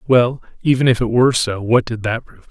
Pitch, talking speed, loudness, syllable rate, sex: 120 Hz, 240 wpm, -17 LUFS, 6.0 syllables/s, male